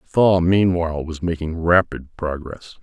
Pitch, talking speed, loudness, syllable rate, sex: 85 Hz, 150 wpm, -19 LUFS, 4.4 syllables/s, male